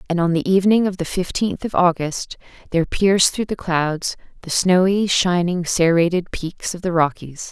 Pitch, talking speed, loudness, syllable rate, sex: 175 Hz, 175 wpm, -19 LUFS, 4.9 syllables/s, female